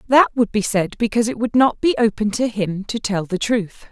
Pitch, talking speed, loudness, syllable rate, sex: 220 Hz, 245 wpm, -19 LUFS, 5.2 syllables/s, female